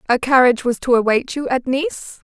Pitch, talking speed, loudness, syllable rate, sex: 245 Hz, 210 wpm, -17 LUFS, 5.4 syllables/s, female